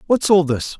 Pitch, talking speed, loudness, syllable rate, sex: 170 Hz, 225 wpm, -16 LUFS, 4.8 syllables/s, male